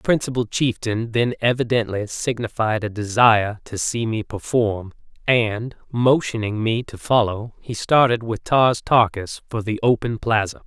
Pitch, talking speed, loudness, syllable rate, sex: 115 Hz, 145 wpm, -20 LUFS, 4.4 syllables/s, male